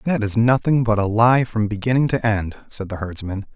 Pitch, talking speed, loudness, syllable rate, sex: 110 Hz, 220 wpm, -19 LUFS, 5.1 syllables/s, male